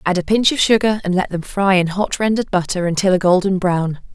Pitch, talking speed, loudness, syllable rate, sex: 190 Hz, 245 wpm, -17 LUFS, 5.9 syllables/s, female